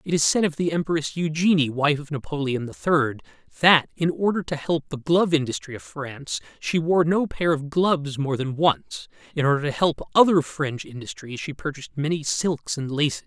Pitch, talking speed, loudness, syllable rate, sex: 150 Hz, 200 wpm, -23 LUFS, 5.2 syllables/s, male